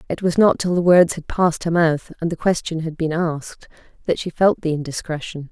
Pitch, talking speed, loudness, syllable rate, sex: 165 Hz, 230 wpm, -19 LUFS, 5.5 syllables/s, female